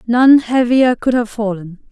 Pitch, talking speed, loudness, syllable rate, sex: 235 Hz, 155 wpm, -14 LUFS, 4.1 syllables/s, female